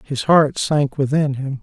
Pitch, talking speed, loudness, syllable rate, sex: 140 Hz, 185 wpm, -18 LUFS, 3.9 syllables/s, male